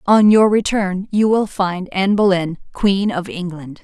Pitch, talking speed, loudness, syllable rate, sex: 195 Hz, 170 wpm, -17 LUFS, 4.3 syllables/s, female